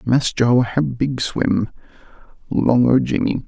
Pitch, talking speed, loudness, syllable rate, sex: 125 Hz, 140 wpm, -18 LUFS, 3.5 syllables/s, male